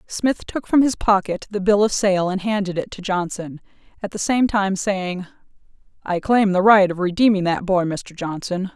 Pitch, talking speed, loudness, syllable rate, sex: 195 Hz, 200 wpm, -20 LUFS, 4.7 syllables/s, female